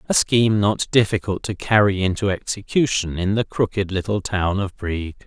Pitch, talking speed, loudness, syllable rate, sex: 100 Hz, 170 wpm, -20 LUFS, 5.0 syllables/s, male